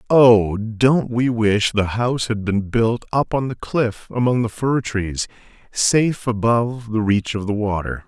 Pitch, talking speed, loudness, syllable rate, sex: 115 Hz, 180 wpm, -19 LUFS, 4.2 syllables/s, male